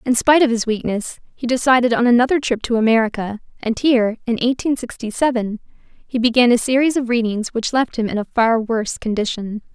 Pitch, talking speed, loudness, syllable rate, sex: 235 Hz, 195 wpm, -18 LUFS, 5.8 syllables/s, female